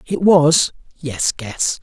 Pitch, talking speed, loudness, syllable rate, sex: 150 Hz, 100 wpm, -16 LUFS, 2.7 syllables/s, male